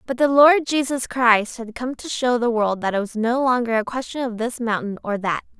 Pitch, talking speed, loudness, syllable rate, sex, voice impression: 240 Hz, 245 wpm, -20 LUFS, 5.2 syllables/s, female, feminine, slightly young, tensed, powerful, bright, clear, slightly raspy, cute, friendly, slightly reassuring, slightly sweet, lively, kind